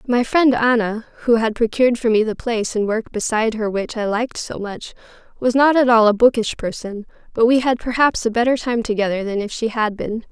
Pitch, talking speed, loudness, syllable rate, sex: 230 Hz, 225 wpm, -18 LUFS, 5.7 syllables/s, female